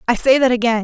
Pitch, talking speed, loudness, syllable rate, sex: 240 Hz, 290 wpm, -15 LUFS, 6.9 syllables/s, female